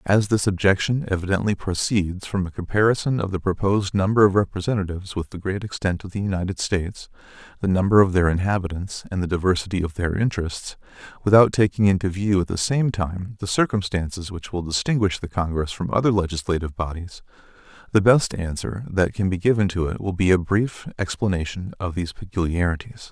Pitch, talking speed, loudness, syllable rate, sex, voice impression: 95 Hz, 180 wpm, -22 LUFS, 5.9 syllables/s, male, masculine, adult-like, tensed, powerful, hard, clear, fluent, cool, intellectual, calm, slightly mature, reassuring, wild, slightly lively, slightly strict